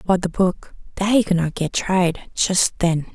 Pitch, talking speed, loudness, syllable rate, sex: 180 Hz, 190 wpm, -20 LUFS, 4.2 syllables/s, female